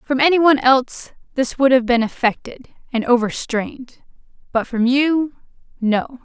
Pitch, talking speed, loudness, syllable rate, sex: 255 Hz, 135 wpm, -18 LUFS, 4.8 syllables/s, female